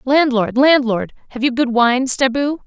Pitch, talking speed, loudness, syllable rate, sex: 255 Hz, 160 wpm, -16 LUFS, 4.3 syllables/s, female